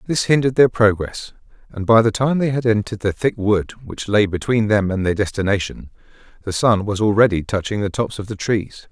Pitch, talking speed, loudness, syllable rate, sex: 105 Hz, 210 wpm, -18 LUFS, 5.6 syllables/s, male